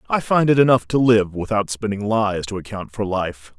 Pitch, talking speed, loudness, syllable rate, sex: 110 Hz, 220 wpm, -19 LUFS, 5.0 syllables/s, male